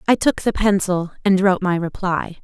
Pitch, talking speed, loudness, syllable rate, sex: 190 Hz, 195 wpm, -19 LUFS, 5.2 syllables/s, female